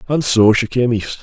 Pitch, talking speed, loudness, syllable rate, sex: 115 Hz, 245 wpm, -15 LUFS, 4.8 syllables/s, male